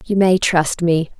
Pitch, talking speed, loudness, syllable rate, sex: 175 Hz, 200 wpm, -16 LUFS, 3.9 syllables/s, female